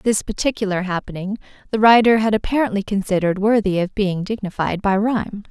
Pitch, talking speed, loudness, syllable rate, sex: 205 Hz, 155 wpm, -19 LUFS, 5.9 syllables/s, female